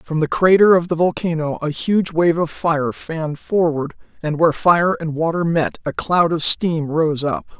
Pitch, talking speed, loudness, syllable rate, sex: 165 Hz, 195 wpm, -18 LUFS, 4.5 syllables/s, female